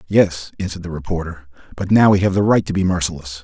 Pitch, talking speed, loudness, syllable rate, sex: 90 Hz, 225 wpm, -18 LUFS, 6.4 syllables/s, male